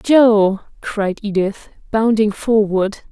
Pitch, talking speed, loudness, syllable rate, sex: 210 Hz, 95 wpm, -17 LUFS, 3.1 syllables/s, female